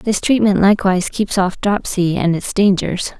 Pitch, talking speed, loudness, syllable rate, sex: 195 Hz, 170 wpm, -16 LUFS, 4.9 syllables/s, female